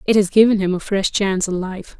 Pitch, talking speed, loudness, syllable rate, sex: 195 Hz, 270 wpm, -17 LUFS, 5.9 syllables/s, female